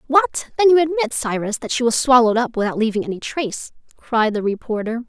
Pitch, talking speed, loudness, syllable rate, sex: 240 Hz, 200 wpm, -19 LUFS, 6.1 syllables/s, female